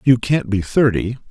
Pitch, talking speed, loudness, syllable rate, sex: 120 Hz, 185 wpm, -17 LUFS, 4.6 syllables/s, male